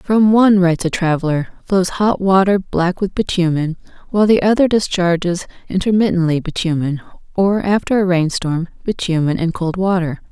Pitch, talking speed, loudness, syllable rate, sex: 180 Hz, 145 wpm, -16 LUFS, 5.2 syllables/s, female